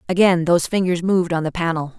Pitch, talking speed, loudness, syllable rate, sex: 175 Hz, 210 wpm, -19 LUFS, 6.7 syllables/s, female